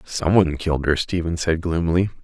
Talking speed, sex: 160 wpm, male